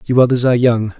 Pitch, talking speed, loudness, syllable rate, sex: 120 Hz, 240 wpm, -14 LUFS, 6.9 syllables/s, male